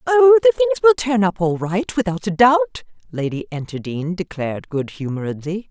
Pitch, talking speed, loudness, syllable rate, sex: 190 Hz, 170 wpm, -18 LUFS, 5.3 syllables/s, female